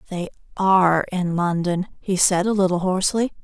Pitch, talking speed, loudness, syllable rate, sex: 185 Hz, 155 wpm, -20 LUFS, 5.2 syllables/s, female